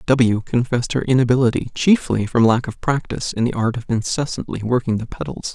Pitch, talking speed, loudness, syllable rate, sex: 120 Hz, 185 wpm, -19 LUFS, 5.7 syllables/s, male